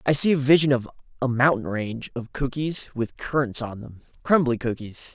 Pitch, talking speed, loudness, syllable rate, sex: 130 Hz, 175 wpm, -23 LUFS, 5.2 syllables/s, male